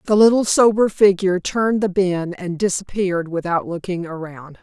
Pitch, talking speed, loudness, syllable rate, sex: 185 Hz, 155 wpm, -18 LUFS, 5.2 syllables/s, female